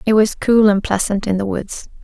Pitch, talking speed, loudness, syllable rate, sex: 205 Hz, 235 wpm, -16 LUFS, 5.0 syllables/s, female